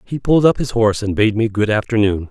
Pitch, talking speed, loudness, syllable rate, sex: 110 Hz, 260 wpm, -16 LUFS, 6.4 syllables/s, male